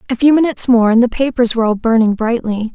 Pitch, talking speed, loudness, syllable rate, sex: 235 Hz, 240 wpm, -13 LUFS, 6.7 syllables/s, female